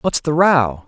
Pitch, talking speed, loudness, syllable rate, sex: 135 Hz, 205 wpm, -15 LUFS, 3.6 syllables/s, male